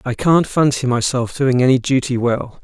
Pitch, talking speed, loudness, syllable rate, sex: 130 Hz, 180 wpm, -16 LUFS, 4.8 syllables/s, male